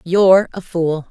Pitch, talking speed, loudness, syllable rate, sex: 175 Hz, 165 wpm, -15 LUFS, 4.3 syllables/s, female